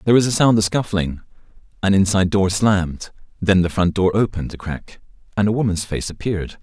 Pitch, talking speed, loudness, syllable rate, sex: 100 Hz, 200 wpm, -19 LUFS, 6.1 syllables/s, male